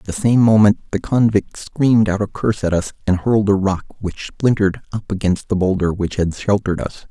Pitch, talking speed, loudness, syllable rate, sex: 100 Hz, 220 wpm, -17 LUFS, 5.7 syllables/s, male